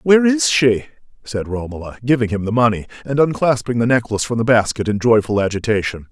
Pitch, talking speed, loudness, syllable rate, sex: 120 Hz, 185 wpm, -17 LUFS, 6.2 syllables/s, male